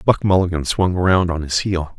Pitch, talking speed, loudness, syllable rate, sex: 90 Hz, 210 wpm, -18 LUFS, 4.8 syllables/s, male